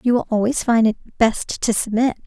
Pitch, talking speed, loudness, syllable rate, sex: 230 Hz, 210 wpm, -19 LUFS, 5.5 syllables/s, female